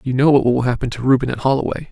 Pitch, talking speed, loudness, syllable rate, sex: 130 Hz, 280 wpm, -17 LUFS, 7.2 syllables/s, male